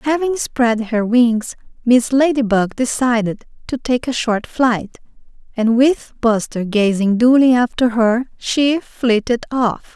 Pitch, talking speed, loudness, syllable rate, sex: 240 Hz, 135 wpm, -16 LUFS, 3.8 syllables/s, female